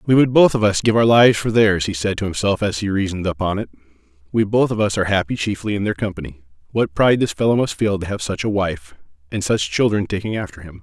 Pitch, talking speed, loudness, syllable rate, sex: 100 Hz, 255 wpm, -18 LUFS, 6.5 syllables/s, male